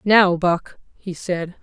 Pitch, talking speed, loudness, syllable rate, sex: 180 Hz, 150 wpm, -19 LUFS, 2.9 syllables/s, female